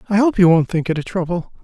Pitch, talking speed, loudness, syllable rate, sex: 185 Hz, 295 wpm, -17 LUFS, 6.6 syllables/s, male